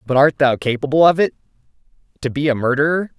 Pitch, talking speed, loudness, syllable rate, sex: 140 Hz, 170 wpm, -17 LUFS, 6.4 syllables/s, male